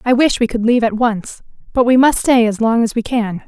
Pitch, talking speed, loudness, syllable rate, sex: 235 Hz, 275 wpm, -15 LUFS, 5.6 syllables/s, female